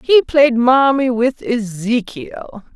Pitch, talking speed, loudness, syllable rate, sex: 245 Hz, 110 wpm, -15 LUFS, 3.1 syllables/s, female